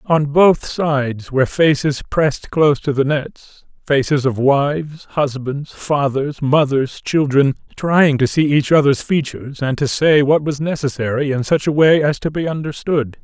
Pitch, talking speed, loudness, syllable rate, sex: 145 Hz, 170 wpm, -16 LUFS, 4.4 syllables/s, male